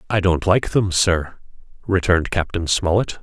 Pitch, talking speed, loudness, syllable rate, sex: 90 Hz, 150 wpm, -19 LUFS, 4.7 syllables/s, male